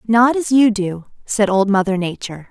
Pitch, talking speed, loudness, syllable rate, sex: 210 Hz, 190 wpm, -16 LUFS, 5.1 syllables/s, female